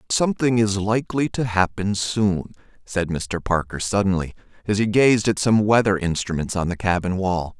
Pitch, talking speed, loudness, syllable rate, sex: 100 Hz, 165 wpm, -21 LUFS, 4.9 syllables/s, male